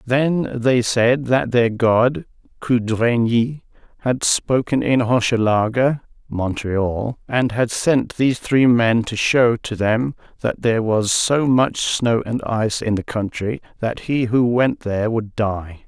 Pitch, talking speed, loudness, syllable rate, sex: 120 Hz, 150 wpm, -19 LUFS, 3.8 syllables/s, male